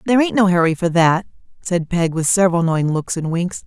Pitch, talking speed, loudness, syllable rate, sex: 175 Hz, 230 wpm, -17 LUFS, 6.0 syllables/s, female